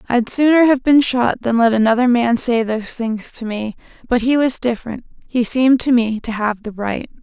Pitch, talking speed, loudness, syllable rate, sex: 240 Hz, 215 wpm, -17 LUFS, 5.2 syllables/s, female